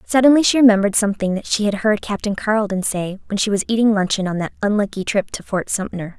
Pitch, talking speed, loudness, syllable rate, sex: 205 Hz, 225 wpm, -18 LUFS, 6.5 syllables/s, female